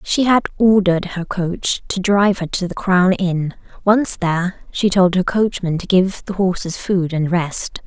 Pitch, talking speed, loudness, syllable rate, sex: 185 Hz, 190 wpm, -17 LUFS, 4.3 syllables/s, female